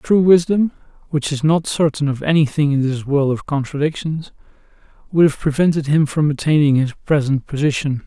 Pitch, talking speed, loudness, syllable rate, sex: 150 Hz, 165 wpm, -17 LUFS, 5.3 syllables/s, male